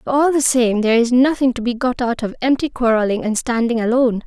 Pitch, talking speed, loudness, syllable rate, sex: 245 Hz, 240 wpm, -17 LUFS, 6.1 syllables/s, female